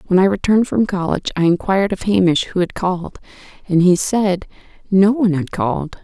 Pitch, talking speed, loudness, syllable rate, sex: 185 Hz, 190 wpm, -17 LUFS, 6.0 syllables/s, female